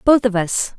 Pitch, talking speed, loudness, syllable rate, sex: 225 Hz, 230 wpm, -17 LUFS, 4.5 syllables/s, female